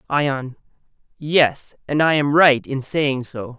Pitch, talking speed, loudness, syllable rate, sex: 140 Hz, 150 wpm, -18 LUFS, 3.4 syllables/s, male